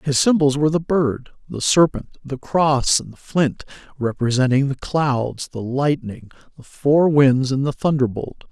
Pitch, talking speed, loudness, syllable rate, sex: 140 Hz, 160 wpm, -19 LUFS, 4.4 syllables/s, male